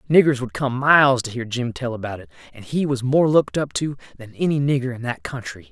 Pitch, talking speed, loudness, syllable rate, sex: 130 Hz, 240 wpm, -21 LUFS, 6.0 syllables/s, male